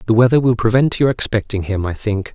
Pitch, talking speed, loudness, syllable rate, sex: 115 Hz, 230 wpm, -16 LUFS, 6.0 syllables/s, male